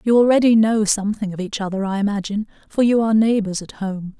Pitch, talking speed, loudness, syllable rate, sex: 210 Hz, 215 wpm, -19 LUFS, 6.4 syllables/s, female